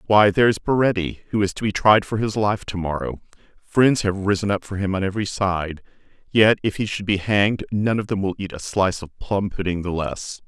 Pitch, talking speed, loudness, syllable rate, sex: 100 Hz, 230 wpm, -21 LUFS, 5.5 syllables/s, male